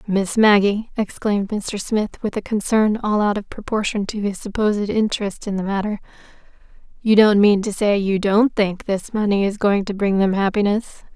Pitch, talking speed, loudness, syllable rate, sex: 205 Hz, 190 wpm, -19 LUFS, 5.0 syllables/s, female